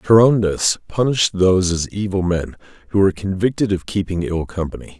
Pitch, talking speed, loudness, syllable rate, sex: 95 Hz, 155 wpm, -18 LUFS, 5.5 syllables/s, male